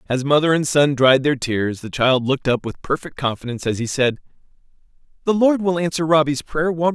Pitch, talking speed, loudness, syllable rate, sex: 145 Hz, 215 wpm, -19 LUFS, 5.7 syllables/s, male